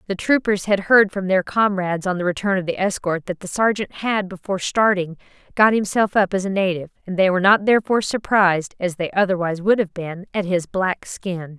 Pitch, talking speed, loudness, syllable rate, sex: 190 Hz, 210 wpm, -20 LUFS, 5.8 syllables/s, female